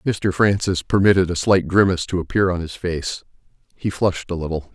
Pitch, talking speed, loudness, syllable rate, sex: 90 Hz, 190 wpm, -20 LUFS, 5.5 syllables/s, male